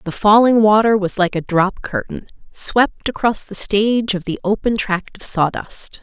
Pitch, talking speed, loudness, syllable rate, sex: 210 Hz, 180 wpm, -17 LUFS, 4.4 syllables/s, female